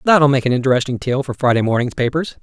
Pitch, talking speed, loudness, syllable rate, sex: 135 Hz, 225 wpm, -17 LUFS, 6.5 syllables/s, male